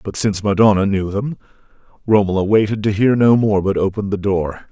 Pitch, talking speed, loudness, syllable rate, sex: 100 Hz, 190 wpm, -16 LUFS, 5.9 syllables/s, male